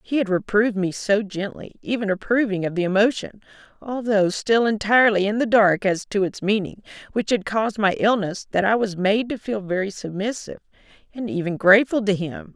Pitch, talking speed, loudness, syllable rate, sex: 205 Hz, 185 wpm, -21 LUFS, 5.5 syllables/s, female